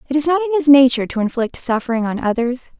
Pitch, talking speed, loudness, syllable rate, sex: 265 Hz, 235 wpm, -16 LUFS, 7.3 syllables/s, female